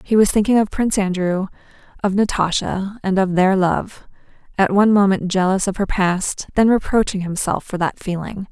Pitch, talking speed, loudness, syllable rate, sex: 195 Hz, 175 wpm, -18 LUFS, 5.1 syllables/s, female